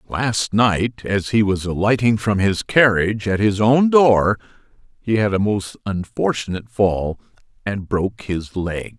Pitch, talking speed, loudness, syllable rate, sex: 105 Hz, 155 wpm, -19 LUFS, 4.2 syllables/s, male